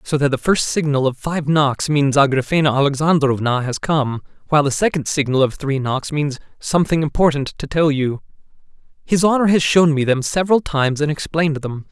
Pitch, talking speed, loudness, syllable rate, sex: 145 Hz, 185 wpm, -17 LUFS, 5.5 syllables/s, male